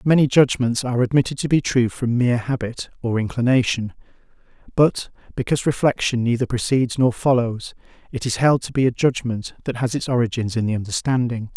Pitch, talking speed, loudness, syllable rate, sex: 125 Hz, 170 wpm, -20 LUFS, 6.0 syllables/s, male